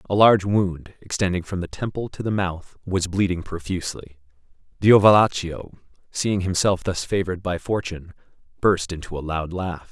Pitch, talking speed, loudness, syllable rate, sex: 90 Hz, 150 wpm, -22 LUFS, 5.2 syllables/s, male